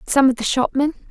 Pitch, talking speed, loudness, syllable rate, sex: 270 Hz, 215 wpm, -18 LUFS, 6.2 syllables/s, female